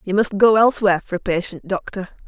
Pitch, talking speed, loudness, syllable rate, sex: 195 Hz, 210 wpm, -18 LUFS, 6.3 syllables/s, female